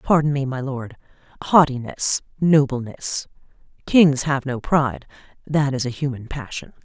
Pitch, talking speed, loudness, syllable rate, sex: 135 Hz, 130 wpm, -20 LUFS, 4.6 syllables/s, female